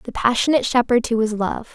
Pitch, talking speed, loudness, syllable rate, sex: 235 Hz, 205 wpm, -19 LUFS, 6.2 syllables/s, female